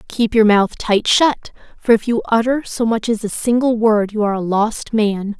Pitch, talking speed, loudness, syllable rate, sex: 220 Hz, 220 wpm, -16 LUFS, 4.6 syllables/s, female